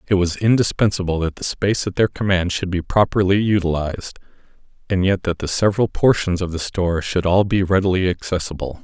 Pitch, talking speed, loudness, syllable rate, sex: 95 Hz, 185 wpm, -19 LUFS, 5.9 syllables/s, male